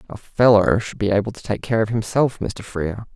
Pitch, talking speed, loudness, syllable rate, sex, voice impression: 110 Hz, 230 wpm, -20 LUFS, 5.5 syllables/s, male, masculine, adult-like, slightly dark, slightly fluent, slightly sincere, slightly kind